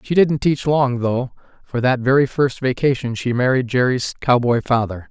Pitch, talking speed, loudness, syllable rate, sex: 130 Hz, 175 wpm, -18 LUFS, 4.7 syllables/s, male